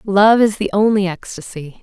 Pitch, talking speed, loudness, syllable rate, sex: 200 Hz, 165 wpm, -15 LUFS, 4.7 syllables/s, female